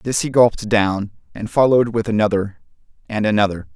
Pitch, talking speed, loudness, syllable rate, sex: 110 Hz, 160 wpm, -18 LUFS, 5.7 syllables/s, male